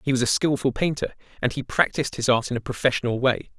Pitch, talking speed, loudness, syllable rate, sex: 130 Hz, 235 wpm, -23 LUFS, 6.6 syllables/s, male